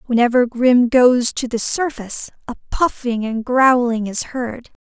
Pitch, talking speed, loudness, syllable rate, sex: 245 Hz, 150 wpm, -17 LUFS, 4.2 syllables/s, female